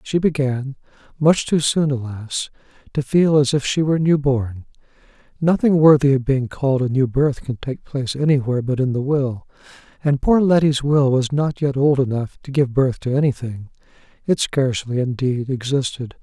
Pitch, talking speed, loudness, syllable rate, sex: 135 Hz, 175 wpm, -19 LUFS, 5.0 syllables/s, male